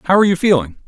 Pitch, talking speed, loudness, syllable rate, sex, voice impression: 170 Hz, 275 wpm, -15 LUFS, 7.9 syllables/s, male, masculine, adult-like, slightly thick, tensed, powerful, slightly hard, clear, fluent, cool, intellectual, calm, slightly mature, reassuring, wild, lively, slightly kind